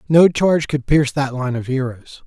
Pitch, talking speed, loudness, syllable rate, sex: 140 Hz, 210 wpm, -18 LUFS, 5.3 syllables/s, male